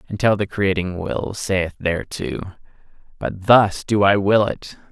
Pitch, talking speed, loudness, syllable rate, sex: 100 Hz, 145 wpm, -19 LUFS, 4.1 syllables/s, male